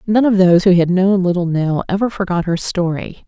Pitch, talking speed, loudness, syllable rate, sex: 185 Hz, 220 wpm, -15 LUFS, 5.5 syllables/s, female